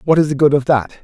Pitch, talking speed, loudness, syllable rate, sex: 140 Hz, 350 wpm, -14 LUFS, 6.6 syllables/s, male